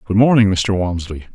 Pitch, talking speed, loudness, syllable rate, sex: 100 Hz, 180 wpm, -16 LUFS, 5.4 syllables/s, male